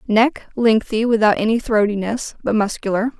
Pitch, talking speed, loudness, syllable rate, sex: 220 Hz, 115 wpm, -18 LUFS, 4.9 syllables/s, female